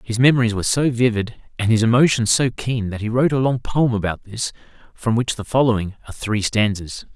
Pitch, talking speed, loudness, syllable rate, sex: 115 Hz, 210 wpm, -19 LUFS, 5.9 syllables/s, male